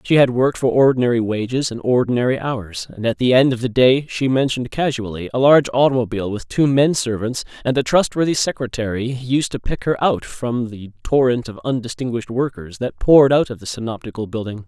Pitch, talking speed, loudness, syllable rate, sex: 125 Hz, 190 wpm, -18 LUFS, 5.9 syllables/s, male